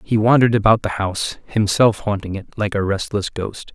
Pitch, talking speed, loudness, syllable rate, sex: 105 Hz, 190 wpm, -19 LUFS, 5.3 syllables/s, male